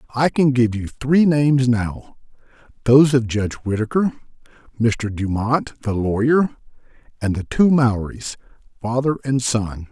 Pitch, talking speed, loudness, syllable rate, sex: 120 Hz, 135 wpm, -19 LUFS, 4.5 syllables/s, male